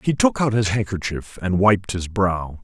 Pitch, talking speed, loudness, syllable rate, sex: 100 Hz, 205 wpm, -21 LUFS, 4.5 syllables/s, male